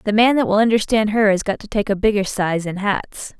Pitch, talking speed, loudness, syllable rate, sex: 210 Hz, 265 wpm, -18 LUFS, 5.6 syllables/s, female